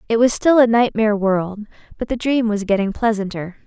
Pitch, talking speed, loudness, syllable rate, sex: 220 Hz, 195 wpm, -17 LUFS, 5.5 syllables/s, female